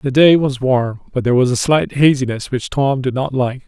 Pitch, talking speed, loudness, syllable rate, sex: 130 Hz, 245 wpm, -16 LUFS, 5.1 syllables/s, male